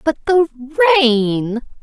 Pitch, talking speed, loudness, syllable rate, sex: 275 Hz, 100 wpm, -15 LUFS, 2.4 syllables/s, female